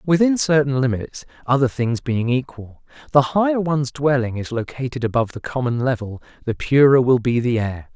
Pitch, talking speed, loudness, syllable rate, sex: 130 Hz, 175 wpm, -19 LUFS, 5.3 syllables/s, male